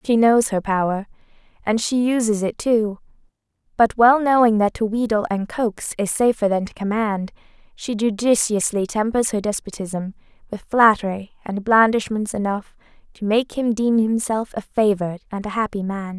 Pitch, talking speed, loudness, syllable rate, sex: 215 Hz, 160 wpm, -20 LUFS, 4.8 syllables/s, female